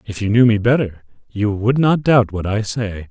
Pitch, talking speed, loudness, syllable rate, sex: 110 Hz, 230 wpm, -17 LUFS, 4.8 syllables/s, male